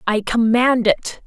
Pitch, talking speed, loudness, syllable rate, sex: 230 Hz, 140 wpm, -17 LUFS, 3.6 syllables/s, female